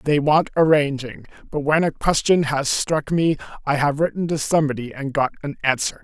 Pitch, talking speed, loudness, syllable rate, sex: 150 Hz, 190 wpm, -20 LUFS, 5.2 syllables/s, male